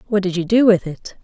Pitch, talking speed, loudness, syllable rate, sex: 195 Hz, 290 wpm, -16 LUFS, 5.8 syllables/s, female